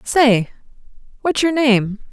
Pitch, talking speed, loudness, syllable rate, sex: 250 Hz, 115 wpm, -16 LUFS, 3.3 syllables/s, female